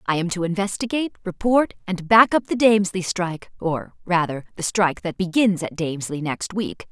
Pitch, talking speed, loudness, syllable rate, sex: 185 Hz, 180 wpm, -22 LUFS, 5.4 syllables/s, female